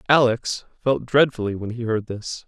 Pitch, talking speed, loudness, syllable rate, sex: 120 Hz, 170 wpm, -22 LUFS, 4.6 syllables/s, male